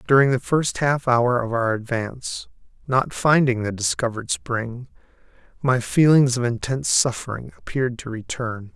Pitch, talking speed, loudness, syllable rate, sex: 120 Hz, 145 wpm, -21 LUFS, 4.8 syllables/s, male